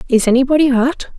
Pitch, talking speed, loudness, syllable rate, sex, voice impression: 260 Hz, 150 wpm, -14 LUFS, 6.5 syllables/s, female, feminine, adult-like, relaxed, weak, bright, soft, raspy, slightly cute, calm, friendly, reassuring, slightly sweet, kind, modest